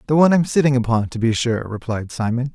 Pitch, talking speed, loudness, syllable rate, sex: 125 Hz, 235 wpm, -19 LUFS, 6.3 syllables/s, male